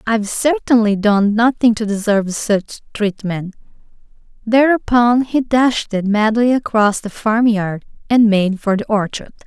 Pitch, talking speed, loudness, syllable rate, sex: 220 Hz, 125 wpm, -16 LUFS, 4.3 syllables/s, female